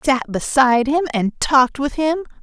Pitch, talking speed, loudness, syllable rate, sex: 275 Hz, 175 wpm, -17 LUFS, 5.0 syllables/s, female